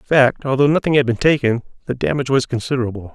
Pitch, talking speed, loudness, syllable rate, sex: 130 Hz, 210 wpm, -17 LUFS, 7.8 syllables/s, male